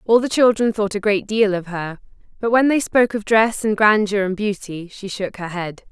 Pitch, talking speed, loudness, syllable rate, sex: 205 Hz, 235 wpm, -18 LUFS, 5.1 syllables/s, female